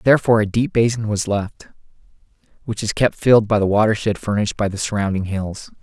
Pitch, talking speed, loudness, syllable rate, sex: 105 Hz, 185 wpm, -19 LUFS, 6.2 syllables/s, male